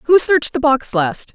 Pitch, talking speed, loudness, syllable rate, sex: 270 Hz, 225 wpm, -16 LUFS, 4.6 syllables/s, female